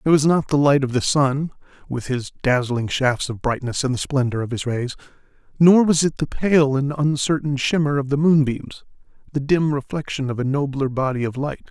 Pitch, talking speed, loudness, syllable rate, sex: 140 Hz, 205 wpm, -20 LUFS, 5.2 syllables/s, male